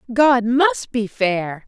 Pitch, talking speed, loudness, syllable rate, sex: 225 Hz, 145 wpm, -18 LUFS, 2.9 syllables/s, female